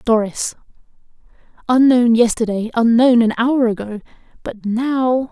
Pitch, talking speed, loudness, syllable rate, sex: 235 Hz, 100 wpm, -16 LUFS, 4.2 syllables/s, female